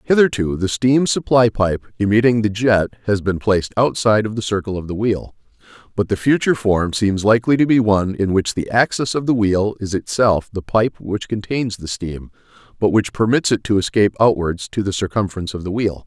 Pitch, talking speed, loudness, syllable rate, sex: 105 Hz, 205 wpm, -18 LUFS, 5.5 syllables/s, male